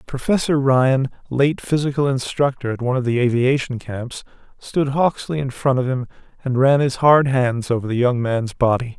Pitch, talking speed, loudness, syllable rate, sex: 130 Hz, 180 wpm, -19 LUFS, 4.9 syllables/s, male